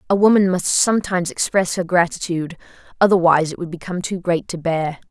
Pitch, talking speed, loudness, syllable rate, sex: 175 Hz, 165 wpm, -18 LUFS, 6.1 syllables/s, female